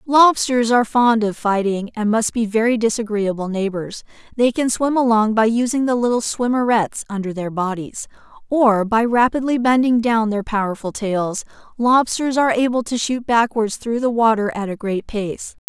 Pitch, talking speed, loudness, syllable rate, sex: 225 Hz, 170 wpm, -18 LUFS, 4.8 syllables/s, female